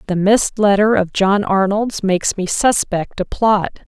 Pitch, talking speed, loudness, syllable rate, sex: 200 Hz, 165 wpm, -16 LUFS, 4.3 syllables/s, female